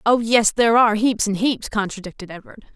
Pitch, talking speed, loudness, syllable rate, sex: 220 Hz, 195 wpm, -18 LUFS, 5.7 syllables/s, female